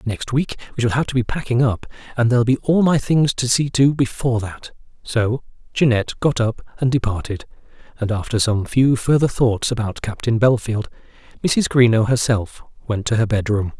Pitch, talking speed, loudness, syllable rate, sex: 120 Hz, 185 wpm, -19 LUFS, 5.3 syllables/s, male